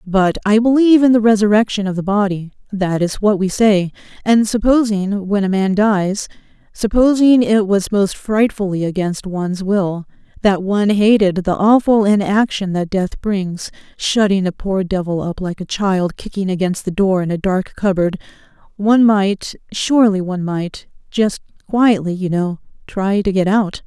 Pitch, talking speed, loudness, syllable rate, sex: 200 Hz, 160 wpm, -16 LUFS, 4.6 syllables/s, female